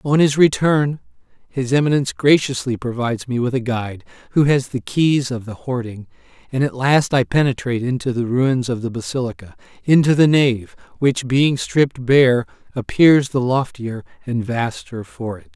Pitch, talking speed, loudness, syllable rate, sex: 130 Hz, 165 wpm, -18 LUFS, 4.9 syllables/s, male